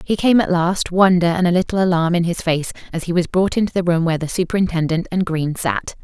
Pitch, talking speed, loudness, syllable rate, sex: 175 Hz, 250 wpm, -18 LUFS, 6.0 syllables/s, female